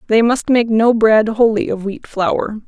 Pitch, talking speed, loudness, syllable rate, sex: 220 Hz, 200 wpm, -15 LUFS, 4.2 syllables/s, female